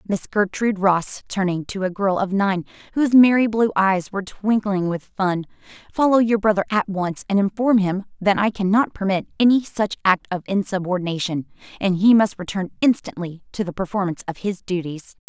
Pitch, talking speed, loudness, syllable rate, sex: 195 Hz, 175 wpm, -20 LUFS, 5.4 syllables/s, female